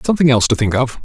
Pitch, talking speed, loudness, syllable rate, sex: 130 Hz, 290 wpm, -14 LUFS, 9.0 syllables/s, male